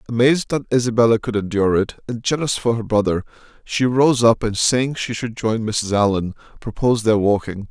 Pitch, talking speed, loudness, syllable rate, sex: 115 Hz, 185 wpm, -19 LUFS, 5.5 syllables/s, male